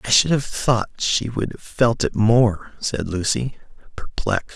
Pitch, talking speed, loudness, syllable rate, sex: 115 Hz, 170 wpm, -21 LUFS, 4.2 syllables/s, male